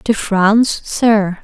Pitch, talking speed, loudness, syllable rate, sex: 210 Hz, 125 wpm, -14 LUFS, 3.0 syllables/s, female